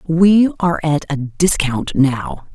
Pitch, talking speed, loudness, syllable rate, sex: 160 Hz, 140 wpm, -16 LUFS, 3.3 syllables/s, female